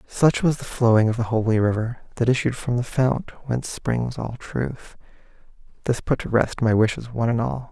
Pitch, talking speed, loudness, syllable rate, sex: 120 Hz, 200 wpm, -22 LUFS, 5.1 syllables/s, male